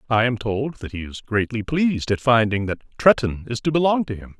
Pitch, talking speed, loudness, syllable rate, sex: 120 Hz, 230 wpm, -21 LUFS, 5.6 syllables/s, male